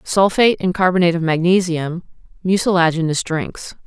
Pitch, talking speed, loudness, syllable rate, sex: 175 Hz, 110 wpm, -17 LUFS, 5.5 syllables/s, female